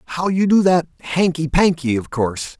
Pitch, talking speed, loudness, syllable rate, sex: 160 Hz, 185 wpm, -18 LUFS, 5.3 syllables/s, male